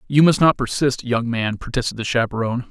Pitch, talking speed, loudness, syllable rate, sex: 125 Hz, 200 wpm, -19 LUFS, 5.9 syllables/s, male